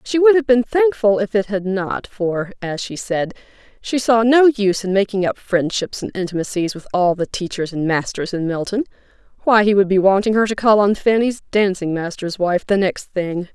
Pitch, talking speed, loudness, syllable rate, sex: 200 Hz, 210 wpm, -18 LUFS, 5.1 syllables/s, female